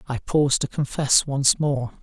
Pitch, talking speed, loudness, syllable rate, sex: 140 Hz, 180 wpm, -21 LUFS, 4.5 syllables/s, male